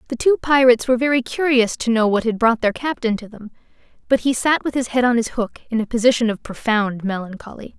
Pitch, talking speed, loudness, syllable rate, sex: 235 Hz, 230 wpm, -18 LUFS, 6.2 syllables/s, female